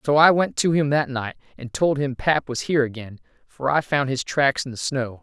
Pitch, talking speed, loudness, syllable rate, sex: 135 Hz, 255 wpm, -21 LUFS, 5.2 syllables/s, male